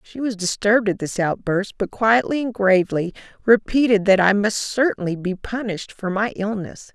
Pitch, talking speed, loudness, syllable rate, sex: 205 Hz, 175 wpm, -20 LUFS, 5.1 syllables/s, female